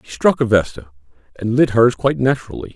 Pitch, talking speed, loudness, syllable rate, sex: 120 Hz, 195 wpm, -17 LUFS, 6.6 syllables/s, male